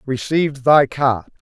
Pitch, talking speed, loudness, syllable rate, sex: 135 Hz, 120 wpm, -17 LUFS, 4.2 syllables/s, male